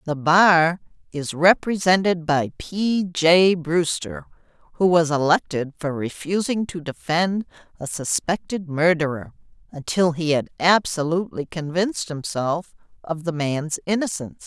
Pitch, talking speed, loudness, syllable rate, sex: 170 Hz, 115 wpm, -21 LUFS, 4.2 syllables/s, female